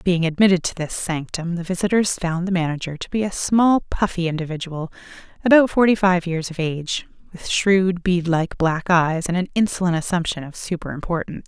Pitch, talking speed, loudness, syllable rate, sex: 175 Hz, 180 wpm, -20 LUFS, 5.5 syllables/s, female